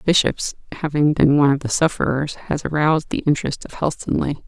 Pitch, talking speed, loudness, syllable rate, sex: 145 Hz, 190 wpm, -20 LUFS, 6.3 syllables/s, female